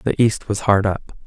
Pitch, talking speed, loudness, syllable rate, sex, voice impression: 105 Hz, 240 wpm, -19 LUFS, 4.3 syllables/s, male, very masculine, very adult-like, thick, slightly relaxed, powerful, bright, soft, muffled, fluent, slightly raspy, very cool, intellectual, slightly refreshing, very sincere, very calm, very mature, very friendly, very reassuring, very unique, elegant, wild, sweet, slightly lively, very kind, modest